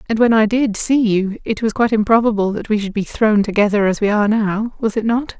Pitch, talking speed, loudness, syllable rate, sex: 215 Hz, 245 wpm, -16 LUFS, 6.0 syllables/s, female